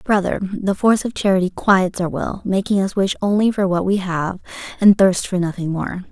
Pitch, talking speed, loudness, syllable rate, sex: 190 Hz, 205 wpm, -18 LUFS, 5.3 syllables/s, female